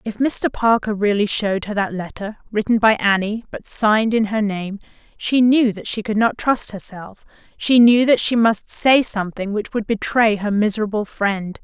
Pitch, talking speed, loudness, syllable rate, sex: 215 Hz, 190 wpm, -18 LUFS, 4.8 syllables/s, female